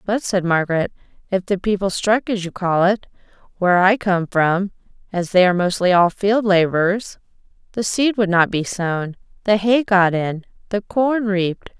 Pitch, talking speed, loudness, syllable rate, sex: 190 Hz, 180 wpm, -18 LUFS, 4.8 syllables/s, female